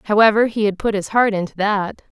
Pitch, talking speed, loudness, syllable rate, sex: 205 Hz, 220 wpm, -18 LUFS, 5.9 syllables/s, female